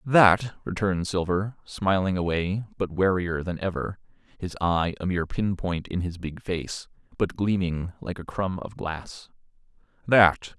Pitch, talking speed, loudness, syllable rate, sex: 90 Hz, 155 wpm, -26 LUFS, 4.2 syllables/s, male